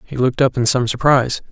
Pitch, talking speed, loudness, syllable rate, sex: 130 Hz, 235 wpm, -16 LUFS, 6.9 syllables/s, male